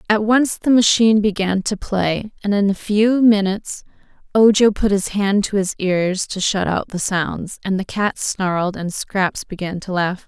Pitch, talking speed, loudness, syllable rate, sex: 200 Hz, 195 wpm, -18 LUFS, 4.4 syllables/s, female